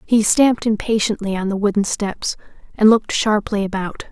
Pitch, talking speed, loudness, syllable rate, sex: 210 Hz, 160 wpm, -18 LUFS, 5.3 syllables/s, female